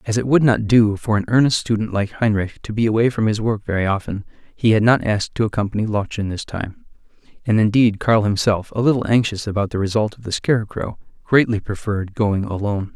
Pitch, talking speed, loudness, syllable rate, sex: 110 Hz, 210 wpm, -19 LUFS, 5.9 syllables/s, male